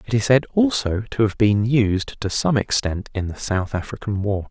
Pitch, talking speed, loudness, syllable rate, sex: 110 Hz, 215 wpm, -21 LUFS, 4.8 syllables/s, male